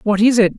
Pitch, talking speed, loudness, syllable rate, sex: 210 Hz, 305 wpm, -14 LUFS, 6.4 syllables/s, female